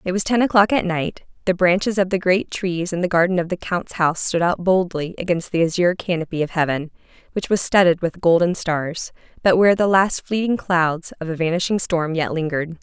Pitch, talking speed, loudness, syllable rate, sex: 175 Hz, 215 wpm, -20 LUFS, 5.6 syllables/s, female